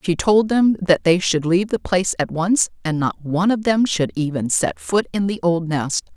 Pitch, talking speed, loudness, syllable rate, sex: 170 Hz, 235 wpm, -19 LUFS, 5.0 syllables/s, female